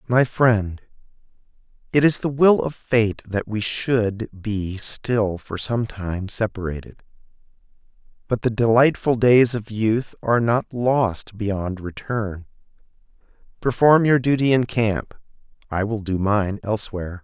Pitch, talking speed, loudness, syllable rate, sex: 110 Hz, 130 wpm, -21 LUFS, 3.9 syllables/s, male